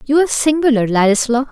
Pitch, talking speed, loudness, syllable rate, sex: 260 Hz, 160 wpm, -14 LUFS, 6.6 syllables/s, female